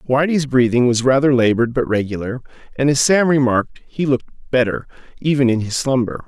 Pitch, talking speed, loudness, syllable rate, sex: 130 Hz, 170 wpm, -17 LUFS, 5.9 syllables/s, male